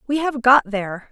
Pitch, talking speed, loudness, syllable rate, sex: 245 Hz, 215 wpm, -18 LUFS, 5.4 syllables/s, female